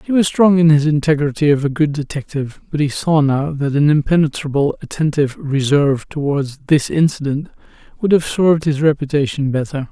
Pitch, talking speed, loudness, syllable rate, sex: 150 Hz, 170 wpm, -16 LUFS, 5.6 syllables/s, male